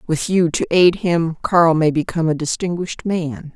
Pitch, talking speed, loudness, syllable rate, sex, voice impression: 165 Hz, 185 wpm, -18 LUFS, 4.9 syllables/s, female, very feminine, middle-aged, slightly thin, tensed, slightly weak, bright, hard, clear, fluent, slightly raspy, cool, very intellectual, slightly refreshing, very sincere, very calm, friendly, reassuring, unique, slightly elegant, wild, slightly sweet, kind, slightly sharp, modest